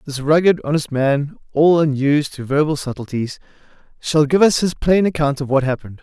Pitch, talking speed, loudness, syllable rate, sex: 145 Hz, 180 wpm, -17 LUFS, 5.6 syllables/s, male